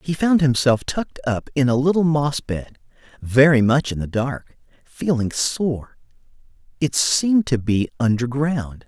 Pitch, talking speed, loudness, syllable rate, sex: 135 Hz, 155 wpm, -20 LUFS, 4.3 syllables/s, male